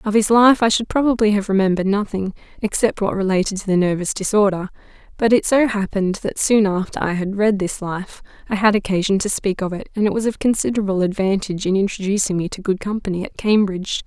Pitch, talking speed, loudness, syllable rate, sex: 200 Hz, 210 wpm, -19 LUFS, 6.2 syllables/s, female